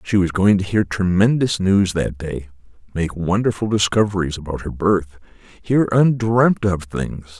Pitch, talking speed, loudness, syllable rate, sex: 95 Hz, 155 wpm, -19 LUFS, 4.3 syllables/s, male